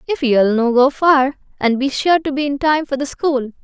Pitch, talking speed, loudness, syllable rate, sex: 275 Hz, 245 wpm, -16 LUFS, 4.8 syllables/s, female